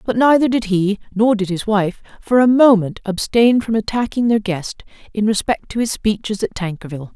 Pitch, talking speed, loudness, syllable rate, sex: 215 Hz, 195 wpm, -17 LUFS, 5.2 syllables/s, female